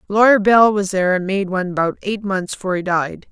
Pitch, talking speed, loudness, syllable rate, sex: 195 Hz, 235 wpm, -17 LUFS, 5.2 syllables/s, female